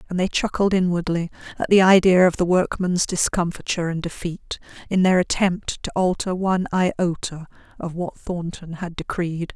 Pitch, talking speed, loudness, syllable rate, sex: 180 Hz, 155 wpm, -21 LUFS, 5.2 syllables/s, female